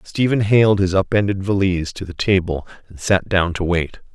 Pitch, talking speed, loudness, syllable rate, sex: 95 Hz, 190 wpm, -18 LUFS, 5.1 syllables/s, male